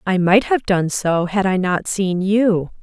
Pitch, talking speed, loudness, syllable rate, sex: 195 Hz, 210 wpm, -17 LUFS, 3.8 syllables/s, female